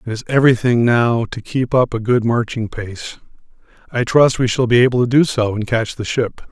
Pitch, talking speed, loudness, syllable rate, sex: 120 Hz, 220 wpm, -16 LUFS, 5.2 syllables/s, male